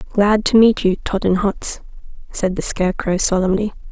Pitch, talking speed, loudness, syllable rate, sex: 195 Hz, 140 wpm, -17 LUFS, 4.9 syllables/s, female